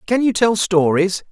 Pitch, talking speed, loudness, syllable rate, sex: 200 Hz, 180 wpm, -16 LUFS, 4.4 syllables/s, male